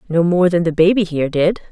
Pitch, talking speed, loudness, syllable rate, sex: 175 Hz, 245 wpm, -15 LUFS, 6.2 syllables/s, female